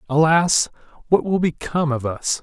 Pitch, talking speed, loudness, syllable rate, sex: 155 Hz, 150 wpm, -19 LUFS, 4.9 syllables/s, male